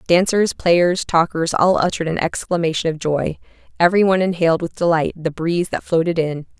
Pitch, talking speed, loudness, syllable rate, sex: 170 Hz, 165 wpm, -18 LUFS, 5.8 syllables/s, female